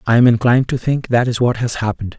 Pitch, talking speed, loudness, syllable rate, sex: 115 Hz, 275 wpm, -16 LUFS, 6.8 syllables/s, male